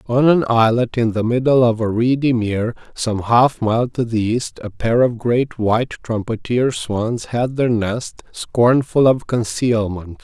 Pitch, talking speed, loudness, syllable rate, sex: 120 Hz, 170 wpm, -18 LUFS, 4.0 syllables/s, male